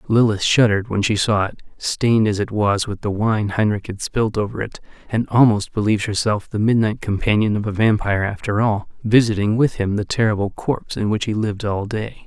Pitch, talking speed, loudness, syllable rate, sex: 105 Hz, 205 wpm, -19 LUFS, 5.6 syllables/s, male